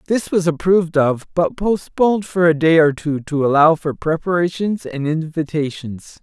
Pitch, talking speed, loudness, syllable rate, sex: 165 Hz, 165 wpm, -17 LUFS, 4.7 syllables/s, male